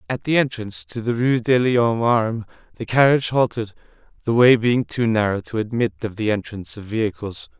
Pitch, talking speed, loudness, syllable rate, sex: 115 Hz, 190 wpm, -20 LUFS, 5.8 syllables/s, male